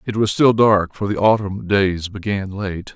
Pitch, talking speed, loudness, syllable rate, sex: 100 Hz, 205 wpm, -18 LUFS, 4.3 syllables/s, male